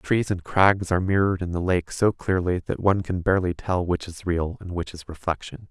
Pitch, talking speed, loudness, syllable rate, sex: 90 Hz, 230 wpm, -24 LUFS, 5.5 syllables/s, male